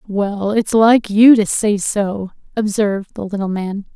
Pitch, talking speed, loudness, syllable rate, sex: 205 Hz, 165 wpm, -16 LUFS, 4.0 syllables/s, female